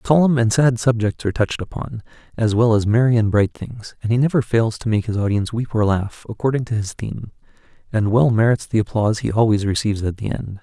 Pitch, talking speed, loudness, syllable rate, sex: 110 Hz, 225 wpm, -19 LUFS, 6.1 syllables/s, male